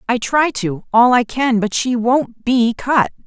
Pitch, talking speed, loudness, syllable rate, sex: 240 Hz, 200 wpm, -16 LUFS, 3.8 syllables/s, female